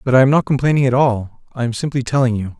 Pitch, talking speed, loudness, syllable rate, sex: 125 Hz, 275 wpm, -17 LUFS, 6.6 syllables/s, male